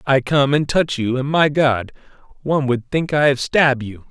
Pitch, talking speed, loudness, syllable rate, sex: 135 Hz, 205 wpm, -18 LUFS, 4.7 syllables/s, male